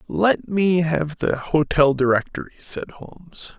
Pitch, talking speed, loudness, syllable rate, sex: 155 Hz, 135 wpm, -20 LUFS, 4.0 syllables/s, male